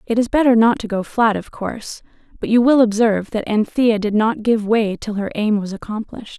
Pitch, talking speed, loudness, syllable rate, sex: 220 Hz, 225 wpm, -18 LUFS, 5.5 syllables/s, female